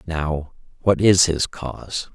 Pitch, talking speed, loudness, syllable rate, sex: 80 Hz, 140 wpm, -20 LUFS, 3.5 syllables/s, male